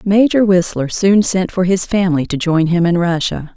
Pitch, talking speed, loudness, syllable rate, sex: 180 Hz, 200 wpm, -14 LUFS, 4.9 syllables/s, female